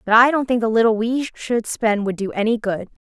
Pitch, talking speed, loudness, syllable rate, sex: 225 Hz, 255 wpm, -19 LUFS, 5.4 syllables/s, female